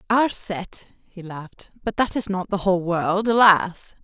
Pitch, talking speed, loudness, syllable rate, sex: 195 Hz, 180 wpm, -21 LUFS, 4.2 syllables/s, female